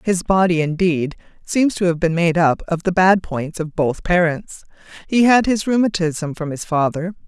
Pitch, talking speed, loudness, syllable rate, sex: 175 Hz, 190 wpm, -18 LUFS, 4.6 syllables/s, female